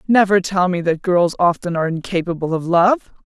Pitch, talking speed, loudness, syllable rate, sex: 180 Hz, 185 wpm, -17 LUFS, 5.4 syllables/s, female